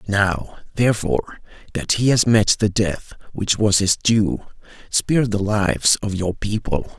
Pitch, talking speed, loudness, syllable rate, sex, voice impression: 105 Hz, 155 wpm, -19 LUFS, 4.3 syllables/s, male, very masculine, middle-aged, very thick, tensed, powerful, slightly bright, soft, slightly muffled, fluent, raspy, cool, slightly intellectual, slightly refreshing, sincere, very calm, very friendly, very reassuring, very unique, elegant, wild, lively, kind, slightly modest